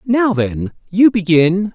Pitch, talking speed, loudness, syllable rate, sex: 190 Hz, 135 wpm, -14 LUFS, 3.3 syllables/s, male